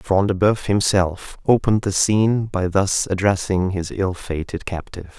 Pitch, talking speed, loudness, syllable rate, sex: 95 Hz, 160 wpm, -20 LUFS, 4.6 syllables/s, male